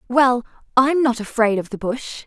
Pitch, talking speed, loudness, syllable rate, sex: 245 Hz, 185 wpm, -19 LUFS, 4.5 syllables/s, female